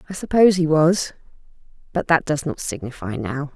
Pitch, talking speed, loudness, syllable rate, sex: 155 Hz, 170 wpm, -20 LUFS, 5.4 syllables/s, female